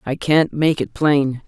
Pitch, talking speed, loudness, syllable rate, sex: 145 Hz, 205 wpm, -18 LUFS, 3.7 syllables/s, female